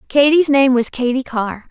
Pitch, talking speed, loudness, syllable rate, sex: 260 Hz, 175 wpm, -15 LUFS, 4.6 syllables/s, female